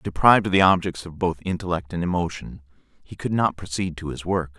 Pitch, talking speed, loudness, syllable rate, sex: 90 Hz, 210 wpm, -23 LUFS, 5.8 syllables/s, male